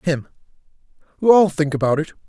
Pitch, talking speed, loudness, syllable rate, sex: 165 Hz, 130 wpm, -18 LUFS, 5.4 syllables/s, male